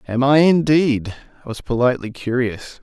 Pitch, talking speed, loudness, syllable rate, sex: 130 Hz, 150 wpm, -18 LUFS, 5.1 syllables/s, male